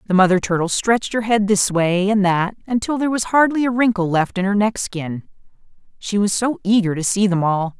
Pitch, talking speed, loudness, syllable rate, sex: 200 Hz, 225 wpm, -18 LUFS, 5.5 syllables/s, female